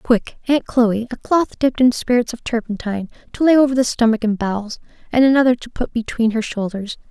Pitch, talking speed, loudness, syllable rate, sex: 235 Hz, 205 wpm, -18 LUFS, 5.7 syllables/s, female